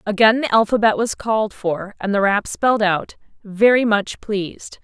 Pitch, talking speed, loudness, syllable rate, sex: 210 Hz, 175 wpm, -18 LUFS, 4.8 syllables/s, female